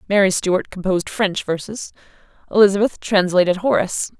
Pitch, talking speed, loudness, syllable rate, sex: 195 Hz, 115 wpm, -18 LUFS, 5.6 syllables/s, female